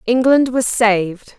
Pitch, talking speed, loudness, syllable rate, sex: 230 Hz, 130 wpm, -15 LUFS, 4.0 syllables/s, female